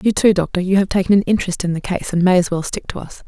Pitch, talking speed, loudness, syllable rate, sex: 185 Hz, 330 wpm, -17 LUFS, 7.0 syllables/s, female